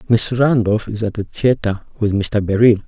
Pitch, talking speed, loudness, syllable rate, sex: 110 Hz, 190 wpm, -17 LUFS, 4.7 syllables/s, male